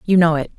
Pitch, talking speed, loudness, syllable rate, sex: 165 Hz, 310 wpm, -16 LUFS, 7.1 syllables/s, female